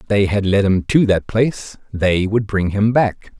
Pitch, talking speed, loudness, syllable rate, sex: 105 Hz, 210 wpm, -17 LUFS, 4.3 syllables/s, male